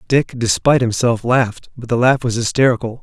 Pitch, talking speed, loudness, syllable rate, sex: 120 Hz, 180 wpm, -16 LUFS, 5.8 syllables/s, male